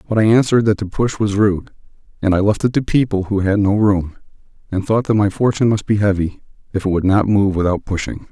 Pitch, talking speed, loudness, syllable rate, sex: 100 Hz, 240 wpm, -17 LUFS, 6.0 syllables/s, male